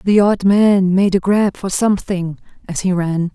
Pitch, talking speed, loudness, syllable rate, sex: 190 Hz, 200 wpm, -16 LUFS, 4.4 syllables/s, female